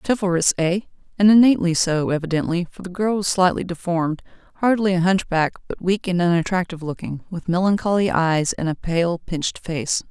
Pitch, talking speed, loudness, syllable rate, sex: 175 Hz, 155 wpm, -20 LUFS, 5.6 syllables/s, female